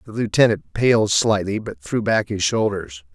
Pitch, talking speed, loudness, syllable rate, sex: 105 Hz, 170 wpm, -20 LUFS, 4.6 syllables/s, male